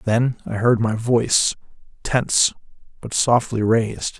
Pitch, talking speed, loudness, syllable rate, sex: 115 Hz, 130 wpm, -19 LUFS, 4.3 syllables/s, male